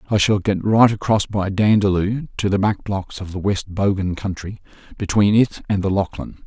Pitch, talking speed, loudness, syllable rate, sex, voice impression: 100 Hz, 195 wpm, -19 LUFS, 5.0 syllables/s, male, very masculine, very adult-like, very middle-aged, very thick, slightly tensed, very powerful, bright, hard, muffled, fluent, slightly raspy, very cool, very intellectual, sincere, very calm, very mature, very friendly, reassuring, very unique, very elegant, sweet, kind